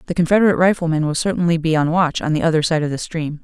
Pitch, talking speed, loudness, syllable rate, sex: 165 Hz, 260 wpm, -17 LUFS, 7.4 syllables/s, female